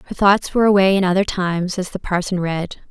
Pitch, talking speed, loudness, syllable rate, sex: 185 Hz, 225 wpm, -18 LUFS, 6.1 syllables/s, female